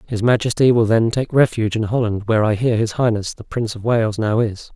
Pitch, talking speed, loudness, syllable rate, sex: 110 Hz, 240 wpm, -18 LUFS, 5.9 syllables/s, male